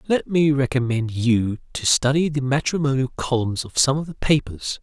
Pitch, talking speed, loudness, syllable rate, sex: 135 Hz, 175 wpm, -21 LUFS, 4.9 syllables/s, male